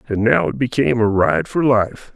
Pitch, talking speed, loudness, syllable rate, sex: 115 Hz, 225 wpm, -17 LUFS, 5.1 syllables/s, male